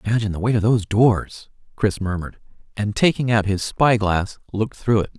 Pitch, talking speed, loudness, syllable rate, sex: 105 Hz, 185 wpm, -20 LUFS, 5.8 syllables/s, male